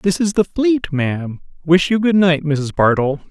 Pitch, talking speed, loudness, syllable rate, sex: 160 Hz, 200 wpm, -16 LUFS, 4.5 syllables/s, male